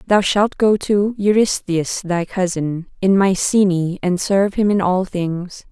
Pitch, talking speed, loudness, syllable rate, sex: 190 Hz, 160 wpm, -17 LUFS, 4.0 syllables/s, female